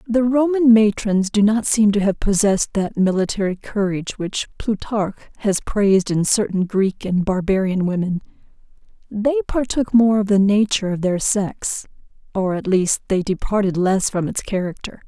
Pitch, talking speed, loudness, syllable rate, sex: 205 Hz, 160 wpm, -19 LUFS, 4.8 syllables/s, female